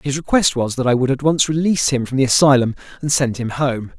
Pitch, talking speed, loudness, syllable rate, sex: 135 Hz, 255 wpm, -17 LUFS, 6.0 syllables/s, male